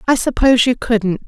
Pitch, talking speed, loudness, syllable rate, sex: 230 Hz, 190 wpm, -15 LUFS, 5.4 syllables/s, female